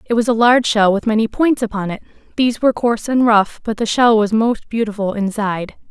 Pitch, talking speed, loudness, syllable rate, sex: 220 Hz, 225 wpm, -16 LUFS, 6.0 syllables/s, female